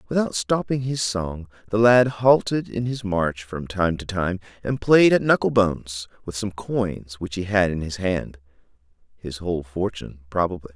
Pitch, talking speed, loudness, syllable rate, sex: 100 Hz, 175 wpm, -22 LUFS, 4.6 syllables/s, male